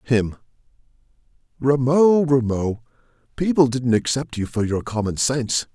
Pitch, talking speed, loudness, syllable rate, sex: 130 Hz, 115 wpm, -20 LUFS, 4.5 syllables/s, male